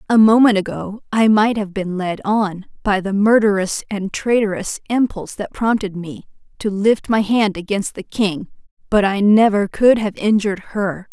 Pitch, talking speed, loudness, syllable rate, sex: 205 Hz, 175 wpm, -17 LUFS, 4.6 syllables/s, female